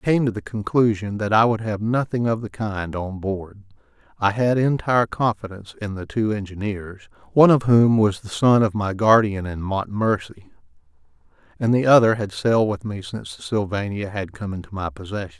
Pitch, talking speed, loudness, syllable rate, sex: 105 Hz, 190 wpm, -21 LUFS, 5.6 syllables/s, male